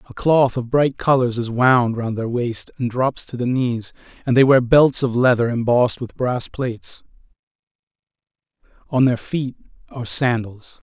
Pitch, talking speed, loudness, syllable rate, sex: 125 Hz, 165 wpm, -19 LUFS, 4.6 syllables/s, male